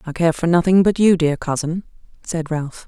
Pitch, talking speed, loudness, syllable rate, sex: 165 Hz, 210 wpm, -18 LUFS, 5.0 syllables/s, female